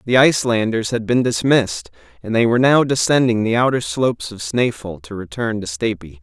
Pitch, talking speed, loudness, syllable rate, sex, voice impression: 115 Hz, 185 wpm, -17 LUFS, 5.6 syllables/s, male, masculine, adult-like, tensed, powerful, slightly bright, clear, fluent, cool, intellectual, friendly, wild, lively, slightly light